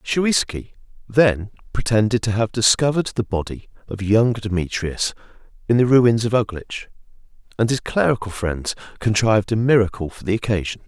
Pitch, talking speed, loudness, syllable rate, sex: 110 Hz, 145 wpm, -20 LUFS, 5.1 syllables/s, male